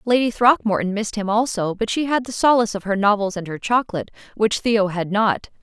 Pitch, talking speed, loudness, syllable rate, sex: 215 Hz, 215 wpm, -20 LUFS, 6.0 syllables/s, female